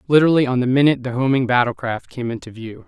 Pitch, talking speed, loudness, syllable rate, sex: 130 Hz, 210 wpm, -18 LUFS, 7.3 syllables/s, male